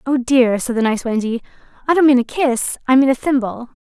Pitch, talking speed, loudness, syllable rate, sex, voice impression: 255 Hz, 235 wpm, -16 LUFS, 5.6 syllables/s, female, feminine, adult-like, slightly relaxed, powerful, soft, slightly muffled, slightly raspy, intellectual, calm, slightly reassuring, elegant, lively, slightly sharp